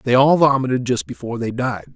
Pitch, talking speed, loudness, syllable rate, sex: 125 Hz, 215 wpm, -18 LUFS, 6.0 syllables/s, male